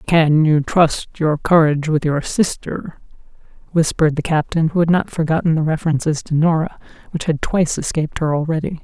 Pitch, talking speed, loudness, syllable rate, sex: 160 Hz, 170 wpm, -17 LUFS, 5.5 syllables/s, female